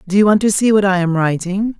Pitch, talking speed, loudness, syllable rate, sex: 195 Hz, 300 wpm, -15 LUFS, 6.2 syllables/s, female